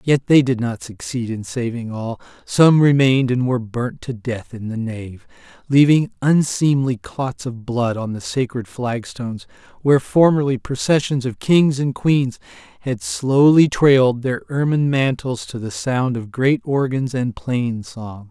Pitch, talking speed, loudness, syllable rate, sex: 125 Hz, 160 wpm, -19 LUFS, 4.3 syllables/s, male